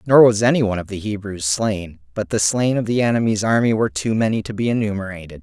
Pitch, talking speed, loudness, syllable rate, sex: 105 Hz, 230 wpm, -19 LUFS, 6.3 syllables/s, male